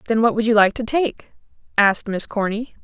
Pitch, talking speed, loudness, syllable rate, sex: 220 Hz, 210 wpm, -19 LUFS, 5.6 syllables/s, female